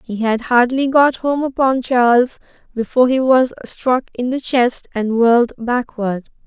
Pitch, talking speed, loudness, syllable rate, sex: 245 Hz, 160 wpm, -16 LUFS, 4.3 syllables/s, female